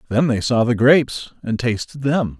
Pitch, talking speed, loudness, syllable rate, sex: 120 Hz, 200 wpm, -18 LUFS, 4.7 syllables/s, male